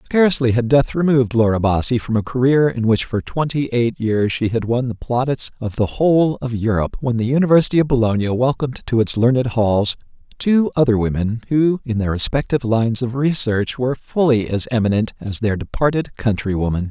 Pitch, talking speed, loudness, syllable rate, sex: 120 Hz, 190 wpm, -18 LUFS, 5.6 syllables/s, male